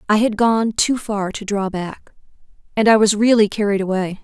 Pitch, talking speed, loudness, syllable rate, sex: 210 Hz, 200 wpm, -17 LUFS, 5.0 syllables/s, female